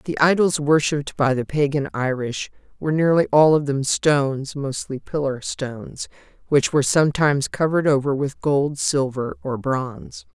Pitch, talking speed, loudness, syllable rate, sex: 140 Hz, 150 wpm, -21 LUFS, 5.0 syllables/s, female